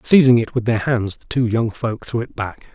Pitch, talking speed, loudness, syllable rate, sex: 115 Hz, 260 wpm, -19 LUFS, 5.1 syllables/s, male